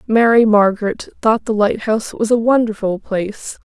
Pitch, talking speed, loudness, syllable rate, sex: 220 Hz, 145 wpm, -16 LUFS, 5.1 syllables/s, female